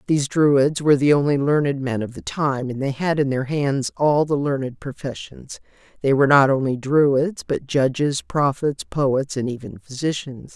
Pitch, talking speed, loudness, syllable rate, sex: 140 Hz, 175 wpm, -20 LUFS, 4.6 syllables/s, female